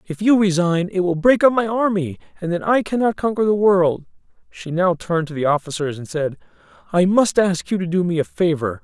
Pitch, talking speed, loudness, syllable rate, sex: 175 Hz, 225 wpm, -19 LUFS, 5.5 syllables/s, male